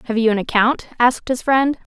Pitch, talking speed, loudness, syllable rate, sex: 240 Hz, 215 wpm, -18 LUFS, 5.8 syllables/s, female